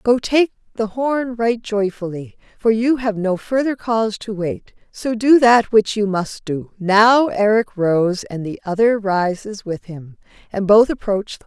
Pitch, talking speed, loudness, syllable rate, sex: 210 Hz, 185 wpm, -18 LUFS, 4.2 syllables/s, female